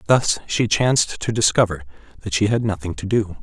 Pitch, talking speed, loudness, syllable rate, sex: 105 Hz, 195 wpm, -20 LUFS, 5.4 syllables/s, male